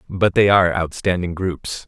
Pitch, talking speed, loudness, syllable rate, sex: 90 Hz, 160 wpm, -18 LUFS, 4.7 syllables/s, male